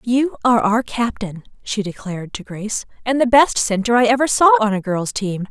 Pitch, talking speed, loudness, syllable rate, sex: 230 Hz, 205 wpm, -18 LUFS, 5.4 syllables/s, female